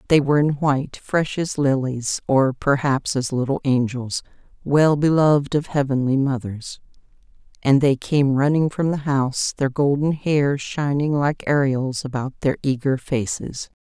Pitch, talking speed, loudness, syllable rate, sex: 140 Hz, 150 wpm, -20 LUFS, 4.5 syllables/s, female